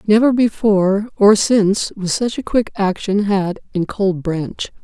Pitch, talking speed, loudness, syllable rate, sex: 205 Hz, 150 wpm, -17 LUFS, 4.0 syllables/s, female